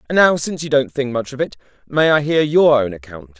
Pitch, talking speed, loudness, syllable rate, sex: 130 Hz, 265 wpm, -17 LUFS, 6.0 syllables/s, male